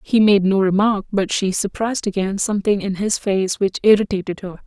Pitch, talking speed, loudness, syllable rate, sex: 200 Hz, 195 wpm, -18 LUFS, 5.5 syllables/s, female